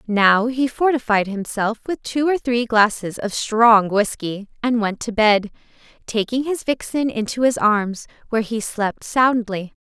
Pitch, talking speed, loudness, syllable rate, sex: 225 Hz, 160 wpm, -19 LUFS, 4.2 syllables/s, female